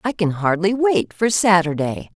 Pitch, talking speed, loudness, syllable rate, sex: 185 Hz, 165 wpm, -18 LUFS, 4.4 syllables/s, female